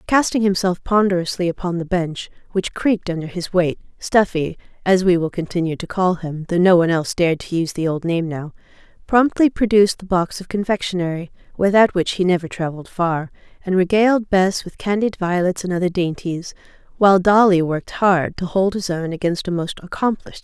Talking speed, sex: 180 wpm, female